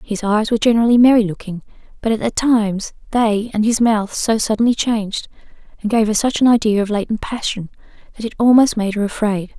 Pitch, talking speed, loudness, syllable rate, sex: 220 Hz, 195 wpm, -16 LUFS, 5.9 syllables/s, female